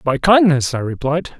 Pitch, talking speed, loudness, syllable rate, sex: 150 Hz, 170 wpm, -15 LUFS, 4.4 syllables/s, male